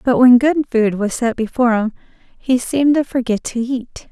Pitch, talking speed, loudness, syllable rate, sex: 245 Hz, 205 wpm, -16 LUFS, 5.0 syllables/s, female